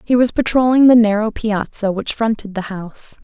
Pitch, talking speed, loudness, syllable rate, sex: 220 Hz, 185 wpm, -16 LUFS, 5.2 syllables/s, female